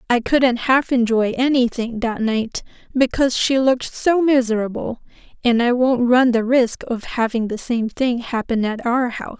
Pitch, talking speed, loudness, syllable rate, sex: 240 Hz, 170 wpm, -19 LUFS, 4.6 syllables/s, female